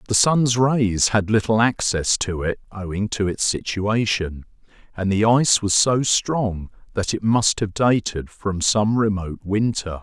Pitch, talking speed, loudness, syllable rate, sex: 105 Hz, 160 wpm, -20 LUFS, 4.1 syllables/s, male